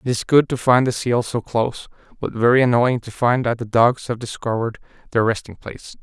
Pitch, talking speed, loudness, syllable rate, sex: 120 Hz, 220 wpm, -19 LUFS, 5.8 syllables/s, male